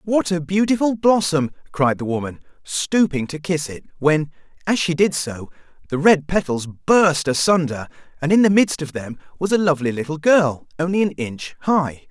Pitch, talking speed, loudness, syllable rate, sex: 165 Hz, 180 wpm, -19 LUFS, 4.9 syllables/s, male